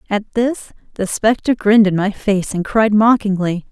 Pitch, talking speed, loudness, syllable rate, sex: 210 Hz, 180 wpm, -16 LUFS, 4.9 syllables/s, female